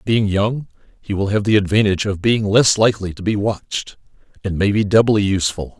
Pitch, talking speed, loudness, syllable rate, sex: 100 Hz, 195 wpm, -17 LUFS, 5.7 syllables/s, male